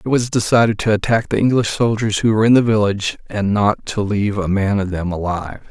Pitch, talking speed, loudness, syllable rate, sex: 105 Hz, 230 wpm, -17 LUFS, 6.0 syllables/s, male